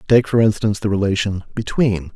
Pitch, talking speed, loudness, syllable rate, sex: 105 Hz, 165 wpm, -18 LUFS, 5.9 syllables/s, male